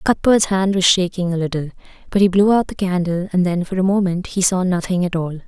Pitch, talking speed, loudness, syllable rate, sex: 185 Hz, 240 wpm, -18 LUFS, 5.8 syllables/s, female